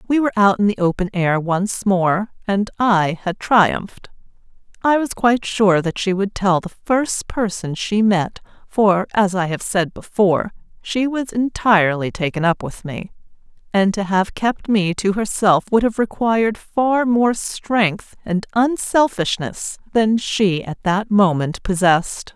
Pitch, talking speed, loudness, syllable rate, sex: 205 Hz, 160 wpm, -18 LUFS, 4.1 syllables/s, female